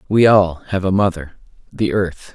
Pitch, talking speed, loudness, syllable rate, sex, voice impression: 95 Hz, 155 wpm, -17 LUFS, 4.7 syllables/s, male, very masculine, very adult-like, slightly middle-aged, thick, tensed, very powerful, bright, slightly hard, clear, fluent, very cool, intellectual, refreshing, very sincere, very calm, mature, very friendly, very reassuring, unique, very elegant, slightly wild, very sweet, lively, kind, slightly modest